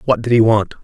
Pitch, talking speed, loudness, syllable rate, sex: 115 Hz, 290 wpm, -14 LUFS, 6.2 syllables/s, male